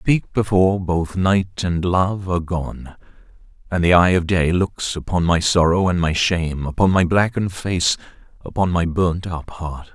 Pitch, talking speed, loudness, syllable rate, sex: 90 Hz, 170 wpm, -19 LUFS, 4.5 syllables/s, male